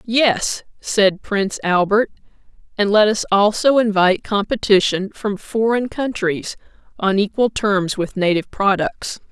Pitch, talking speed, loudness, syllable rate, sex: 205 Hz, 120 wpm, -18 LUFS, 4.2 syllables/s, female